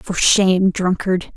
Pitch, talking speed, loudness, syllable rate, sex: 185 Hz, 130 wpm, -16 LUFS, 3.8 syllables/s, female